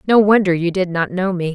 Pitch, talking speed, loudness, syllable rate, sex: 185 Hz, 270 wpm, -16 LUFS, 5.5 syllables/s, female